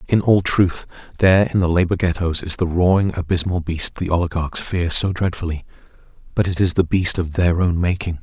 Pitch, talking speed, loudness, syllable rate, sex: 85 Hz, 190 wpm, -18 LUFS, 5.4 syllables/s, male